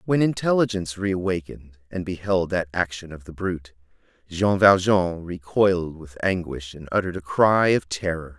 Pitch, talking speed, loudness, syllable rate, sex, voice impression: 90 Hz, 155 wpm, -23 LUFS, 5.2 syllables/s, male, masculine, middle-aged, tensed, powerful, slightly hard, fluent, intellectual, slightly mature, wild, lively, slightly strict, slightly sharp